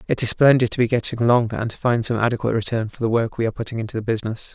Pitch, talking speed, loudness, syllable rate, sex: 115 Hz, 290 wpm, -21 LUFS, 7.8 syllables/s, male